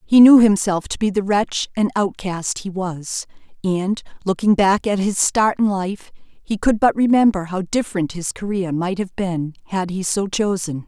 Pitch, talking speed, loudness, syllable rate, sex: 195 Hz, 190 wpm, -19 LUFS, 4.4 syllables/s, female